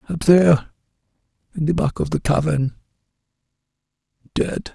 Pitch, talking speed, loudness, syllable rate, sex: 155 Hz, 90 wpm, -19 LUFS, 5.1 syllables/s, male